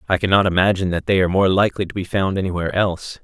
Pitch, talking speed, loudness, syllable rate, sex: 95 Hz, 260 wpm, -18 LUFS, 7.9 syllables/s, male